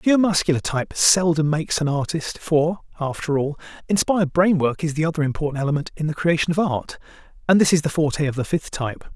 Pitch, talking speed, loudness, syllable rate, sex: 160 Hz, 215 wpm, -21 LUFS, 6.2 syllables/s, male